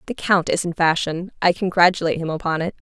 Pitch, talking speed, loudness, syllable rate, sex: 170 Hz, 210 wpm, -20 LUFS, 6.3 syllables/s, female